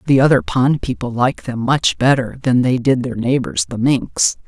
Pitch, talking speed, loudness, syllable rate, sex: 125 Hz, 200 wpm, -16 LUFS, 4.8 syllables/s, female